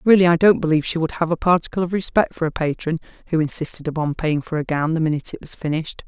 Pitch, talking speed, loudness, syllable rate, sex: 160 Hz, 255 wpm, -20 LUFS, 7.1 syllables/s, female